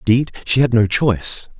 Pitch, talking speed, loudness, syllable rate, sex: 120 Hz, 190 wpm, -16 LUFS, 5.6 syllables/s, male